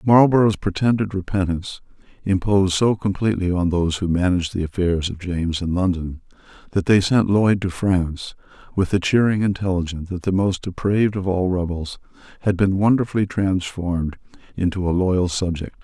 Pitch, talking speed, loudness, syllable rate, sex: 95 Hz, 155 wpm, -20 LUFS, 5.5 syllables/s, male